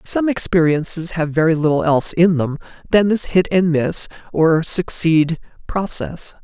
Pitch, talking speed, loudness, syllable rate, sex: 170 Hz, 150 wpm, -17 LUFS, 4.4 syllables/s, male